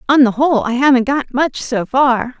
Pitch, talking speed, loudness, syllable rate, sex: 255 Hz, 225 wpm, -14 LUFS, 5.0 syllables/s, female